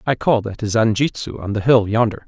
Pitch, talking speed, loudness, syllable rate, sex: 115 Hz, 235 wpm, -18 LUFS, 6.2 syllables/s, male